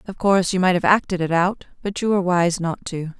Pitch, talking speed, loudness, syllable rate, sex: 180 Hz, 265 wpm, -20 LUFS, 5.9 syllables/s, female